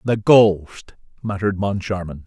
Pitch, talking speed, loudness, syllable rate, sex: 100 Hz, 105 wpm, -18 LUFS, 4.2 syllables/s, male